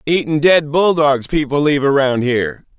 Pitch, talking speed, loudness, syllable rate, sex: 145 Hz, 150 wpm, -15 LUFS, 5.1 syllables/s, male